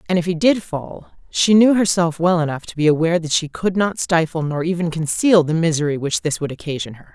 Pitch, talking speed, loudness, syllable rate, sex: 165 Hz, 235 wpm, -18 LUFS, 5.7 syllables/s, female